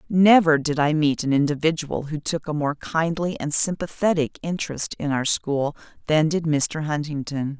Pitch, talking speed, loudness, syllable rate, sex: 155 Hz, 165 wpm, -22 LUFS, 4.7 syllables/s, female